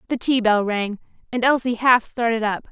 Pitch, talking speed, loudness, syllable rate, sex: 230 Hz, 200 wpm, -20 LUFS, 5.0 syllables/s, female